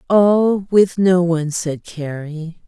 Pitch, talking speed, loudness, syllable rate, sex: 175 Hz, 135 wpm, -17 LUFS, 3.3 syllables/s, female